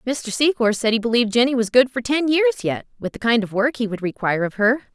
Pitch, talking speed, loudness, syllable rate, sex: 240 Hz, 265 wpm, -19 LUFS, 6.5 syllables/s, female